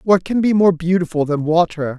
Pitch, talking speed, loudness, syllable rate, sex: 170 Hz, 210 wpm, -16 LUFS, 5.3 syllables/s, male